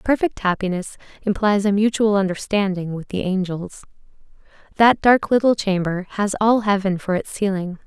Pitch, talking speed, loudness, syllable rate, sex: 200 Hz, 145 wpm, -20 LUFS, 5.0 syllables/s, female